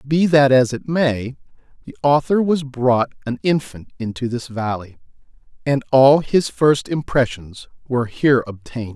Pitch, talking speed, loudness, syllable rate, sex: 130 Hz, 145 wpm, -18 LUFS, 4.6 syllables/s, male